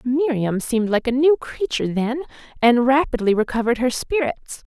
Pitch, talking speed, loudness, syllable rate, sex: 255 Hz, 155 wpm, -20 LUFS, 5.3 syllables/s, female